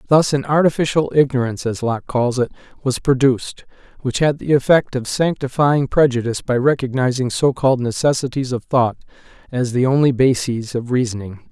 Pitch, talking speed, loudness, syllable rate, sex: 130 Hz, 150 wpm, -18 LUFS, 5.6 syllables/s, male